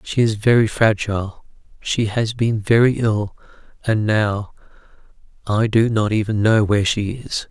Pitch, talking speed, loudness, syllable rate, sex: 110 Hz, 145 wpm, -18 LUFS, 4.4 syllables/s, male